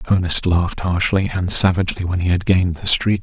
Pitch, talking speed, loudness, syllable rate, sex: 90 Hz, 205 wpm, -17 LUFS, 6.0 syllables/s, male